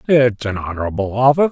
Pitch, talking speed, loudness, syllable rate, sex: 120 Hz, 160 wpm, -17 LUFS, 6.5 syllables/s, male